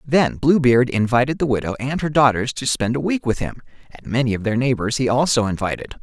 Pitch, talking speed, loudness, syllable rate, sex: 125 Hz, 220 wpm, -19 LUFS, 5.7 syllables/s, male